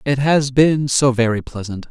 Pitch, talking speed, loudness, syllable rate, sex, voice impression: 130 Hz, 190 wpm, -16 LUFS, 4.6 syllables/s, male, masculine, adult-like, tensed, powerful, bright, clear, fluent, intellectual, refreshing, friendly, reassuring, slightly unique, lively, light